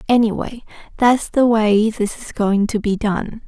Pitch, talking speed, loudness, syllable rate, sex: 220 Hz, 175 wpm, -18 LUFS, 4.1 syllables/s, female